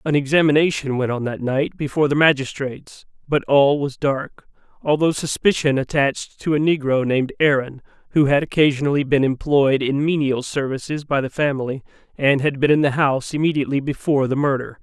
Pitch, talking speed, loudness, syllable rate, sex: 140 Hz, 170 wpm, -19 LUFS, 5.7 syllables/s, male